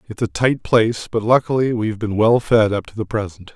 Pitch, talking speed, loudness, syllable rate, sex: 110 Hz, 235 wpm, -18 LUFS, 5.7 syllables/s, male